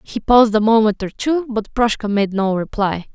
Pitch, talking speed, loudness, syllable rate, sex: 220 Hz, 210 wpm, -17 LUFS, 5.0 syllables/s, female